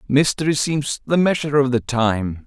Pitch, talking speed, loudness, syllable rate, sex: 135 Hz, 170 wpm, -19 LUFS, 4.9 syllables/s, male